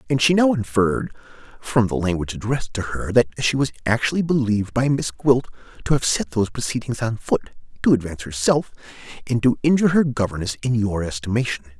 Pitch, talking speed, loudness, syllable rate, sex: 120 Hz, 185 wpm, -21 LUFS, 6.3 syllables/s, male